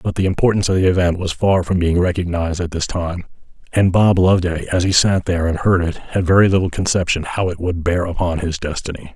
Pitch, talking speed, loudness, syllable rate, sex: 90 Hz, 230 wpm, -17 LUFS, 6.2 syllables/s, male